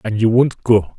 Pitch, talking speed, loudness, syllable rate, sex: 110 Hz, 245 wpm, -15 LUFS, 4.5 syllables/s, male